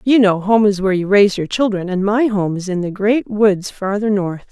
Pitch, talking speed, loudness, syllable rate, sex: 200 Hz, 255 wpm, -16 LUFS, 5.2 syllables/s, female